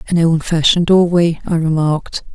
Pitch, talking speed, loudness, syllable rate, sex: 165 Hz, 130 wpm, -14 LUFS, 5.5 syllables/s, female